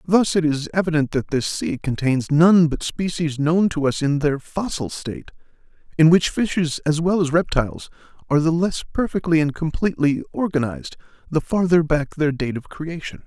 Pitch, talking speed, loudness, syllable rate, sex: 160 Hz, 175 wpm, -20 LUFS, 5.1 syllables/s, male